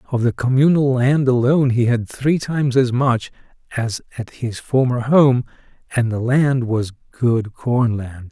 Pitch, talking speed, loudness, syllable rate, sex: 125 Hz, 165 wpm, -18 LUFS, 4.3 syllables/s, male